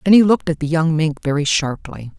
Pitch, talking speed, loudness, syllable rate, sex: 160 Hz, 245 wpm, -17 LUFS, 5.9 syllables/s, female